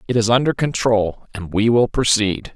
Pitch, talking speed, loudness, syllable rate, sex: 110 Hz, 190 wpm, -18 LUFS, 4.7 syllables/s, male